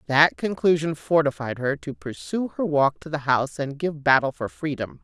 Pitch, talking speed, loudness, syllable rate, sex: 150 Hz, 190 wpm, -23 LUFS, 5.0 syllables/s, female